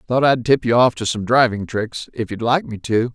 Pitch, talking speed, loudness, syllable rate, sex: 120 Hz, 250 wpm, -18 LUFS, 5.1 syllables/s, male